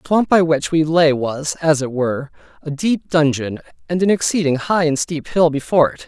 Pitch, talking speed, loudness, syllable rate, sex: 155 Hz, 215 wpm, -17 LUFS, 5.2 syllables/s, male